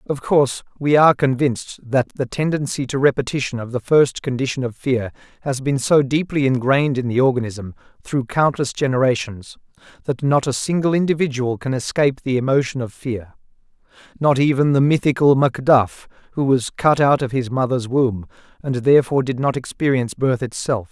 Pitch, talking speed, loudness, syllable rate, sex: 130 Hz, 165 wpm, -19 LUFS, 5.4 syllables/s, male